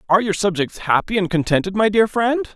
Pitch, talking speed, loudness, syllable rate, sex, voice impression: 200 Hz, 210 wpm, -18 LUFS, 5.9 syllables/s, male, masculine, adult-like, slightly middle-aged, very tensed, powerful, very bright, slightly soft, very clear, very fluent, cool, intellectual, very refreshing, sincere, slightly calm, very friendly, reassuring, very unique, slightly elegant, wild, slightly sweet, very lively, kind